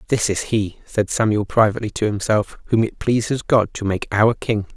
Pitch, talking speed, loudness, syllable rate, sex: 105 Hz, 200 wpm, -20 LUFS, 5.1 syllables/s, male